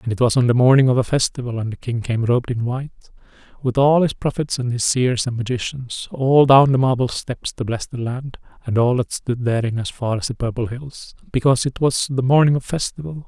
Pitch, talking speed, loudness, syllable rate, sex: 125 Hz, 235 wpm, -19 LUFS, 5.6 syllables/s, male